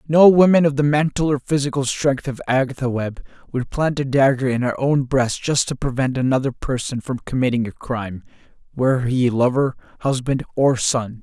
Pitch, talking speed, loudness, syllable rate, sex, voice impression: 130 Hz, 180 wpm, -19 LUFS, 5.2 syllables/s, male, masculine, very adult-like, slightly thick, sincere, slightly calm, friendly